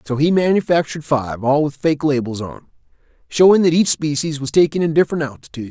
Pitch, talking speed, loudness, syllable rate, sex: 150 Hz, 190 wpm, -17 LUFS, 6.4 syllables/s, male